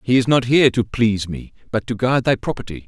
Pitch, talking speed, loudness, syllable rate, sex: 120 Hz, 250 wpm, -19 LUFS, 6.2 syllables/s, male